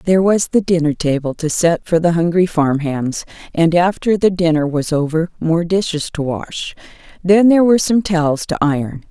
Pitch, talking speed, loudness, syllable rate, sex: 170 Hz, 190 wpm, -16 LUFS, 5.1 syllables/s, female